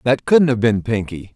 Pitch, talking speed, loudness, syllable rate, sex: 120 Hz, 220 wpm, -17 LUFS, 4.9 syllables/s, male